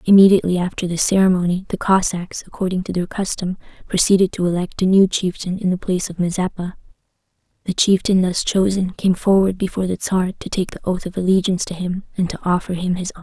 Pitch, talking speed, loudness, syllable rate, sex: 185 Hz, 200 wpm, -19 LUFS, 6.4 syllables/s, female